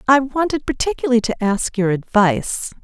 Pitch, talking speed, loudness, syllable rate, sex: 240 Hz, 150 wpm, -18 LUFS, 5.5 syllables/s, female